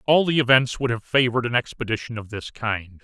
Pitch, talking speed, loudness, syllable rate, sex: 120 Hz, 220 wpm, -22 LUFS, 5.9 syllables/s, male